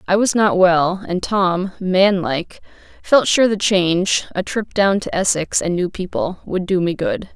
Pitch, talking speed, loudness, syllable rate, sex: 185 Hz, 190 wpm, -17 LUFS, 4.3 syllables/s, female